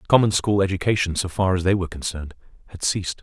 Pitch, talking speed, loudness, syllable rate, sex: 95 Hz, 205 wpm, -22 LUFS, 7.0 syllables/s, male